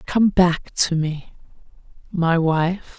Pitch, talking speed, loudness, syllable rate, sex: 170 Hz, 100 wpm, -20 LUFS, 2.8 syllables/s, female